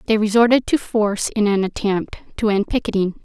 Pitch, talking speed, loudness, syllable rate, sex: 210 Hz, 185 wpm, -19 LUFS, 5.9 syllables/s, female